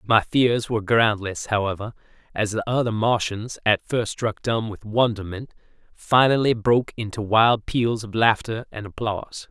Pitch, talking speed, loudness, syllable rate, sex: 110 Hz, 150 wpm, -22 LUFS, 4.6 syllables/s, male